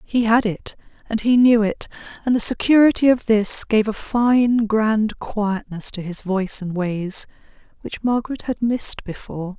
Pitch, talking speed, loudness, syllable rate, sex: 220 Hz, 170 wpm, -19 LUFS, 4.5 syllables/s, female